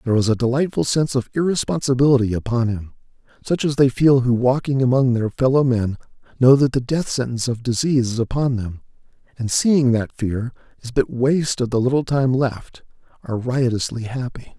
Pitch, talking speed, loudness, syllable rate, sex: 125 Hz, 180 wpm, -19 LUFS, 5.7 syllables/s, male